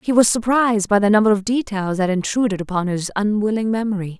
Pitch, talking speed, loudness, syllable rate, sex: 210 Hz, 200 wpm, -18 LUFS, 6.2 syllables/s, female